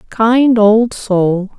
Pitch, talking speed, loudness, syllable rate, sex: 215 Hz, 115 wpm, -12 LUFS, 2.2 syllables/s, female